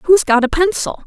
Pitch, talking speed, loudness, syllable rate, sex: 320 Hz, 225 wpm, -14 LUFS, 4.9 syllables/s, female